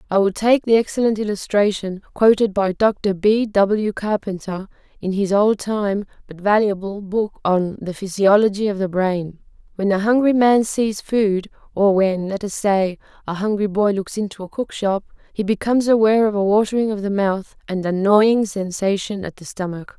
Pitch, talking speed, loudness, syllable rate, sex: 205 Hz, 175 wpm, -19 LUFS, 4.9 syllables/s, female